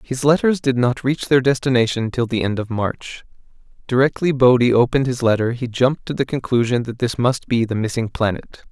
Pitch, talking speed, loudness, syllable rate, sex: 125 Hz, 200 wpm, -18 LUFS, 5.4 syllables/s, male